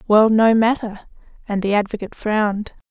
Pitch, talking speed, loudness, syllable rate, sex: 215 Hz, 145 wpm, -18 LUFS, 5.3 syllables/s, female